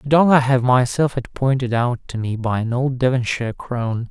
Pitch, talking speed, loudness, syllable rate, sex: 125 Hz, 220 wpm, -19 LUFS, 5.3 syllables/s, male